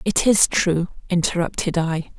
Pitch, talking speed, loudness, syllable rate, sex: 175 Hz, 135 wpm, -20 LUFS, 4.4 syllables/s, female